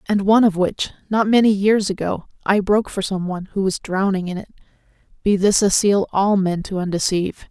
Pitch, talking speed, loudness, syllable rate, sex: 195 Hz, 210 wpm, -19 LUFS, 5.7 syllables/s, female